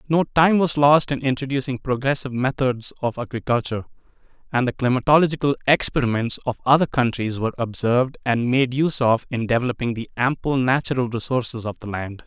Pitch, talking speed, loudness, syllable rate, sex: 130 Hz, 155 wpm, -21 LUFS, 6.0 syllables/s, male